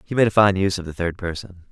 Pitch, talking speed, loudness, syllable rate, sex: 95 Hz, 315 wpm, -20 LUFS, 7.0 syllables/s, male